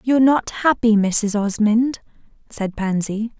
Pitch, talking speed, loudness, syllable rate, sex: 225 Hz, 125 wpm, -18 LUFS, 3.9 syllables/s, female